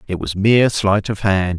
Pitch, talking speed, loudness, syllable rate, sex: 100 Hz, 230 wpm, -16 LUFS, 4.7 syllables/s, male